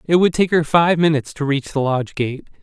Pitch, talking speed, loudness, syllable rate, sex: 150 Hz, 250 wpm, -18 LUFS, 5.8 syllables/s, male